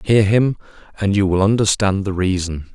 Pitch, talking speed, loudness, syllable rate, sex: 100 Hz, 175 wpm, -17 LUFS, 5.0 syllables/s, male